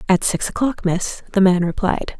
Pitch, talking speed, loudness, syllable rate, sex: 195 Hz, 190 wpm, -19 LUFS, 4.8 syllables/s, female